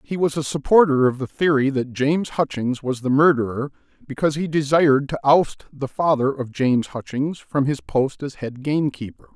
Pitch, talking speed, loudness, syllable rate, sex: 140 Hz, 185 wpm, -20 LUFS, 5.3 syllables/s, male